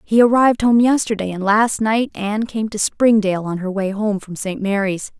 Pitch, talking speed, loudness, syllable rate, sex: 210 Hz, 210 wpm, -17 LUFS, 5.2 syllables/s, female